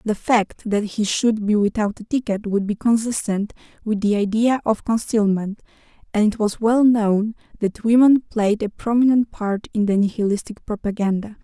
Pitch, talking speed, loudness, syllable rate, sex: 215 Hz, 170 wpm, -20 LUFS, 4.8 syllables/s, female